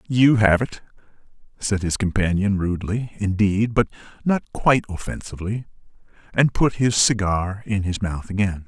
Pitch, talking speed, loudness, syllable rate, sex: 105 Hz, 130 wpm, -21 LUFS, 4.9 syllables/s, male